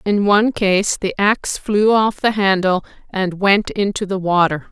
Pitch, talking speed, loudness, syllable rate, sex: 195 Hz, 180 wpm, -17 LUFS, 4.2 syllables/s, female